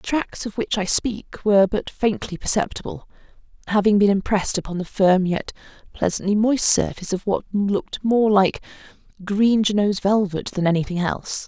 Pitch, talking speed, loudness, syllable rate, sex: 200 Hz, 155 wpm, -21 LUFS, 5.4 syllables/s, female